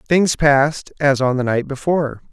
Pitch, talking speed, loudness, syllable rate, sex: 140 Hz, 180 wpm, -17 LUFS, 5.0 syllables/s, male